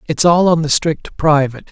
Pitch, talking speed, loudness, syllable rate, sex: 155 Hz, 210 wpm, -14 LUFS, 5.0 syllables/s, male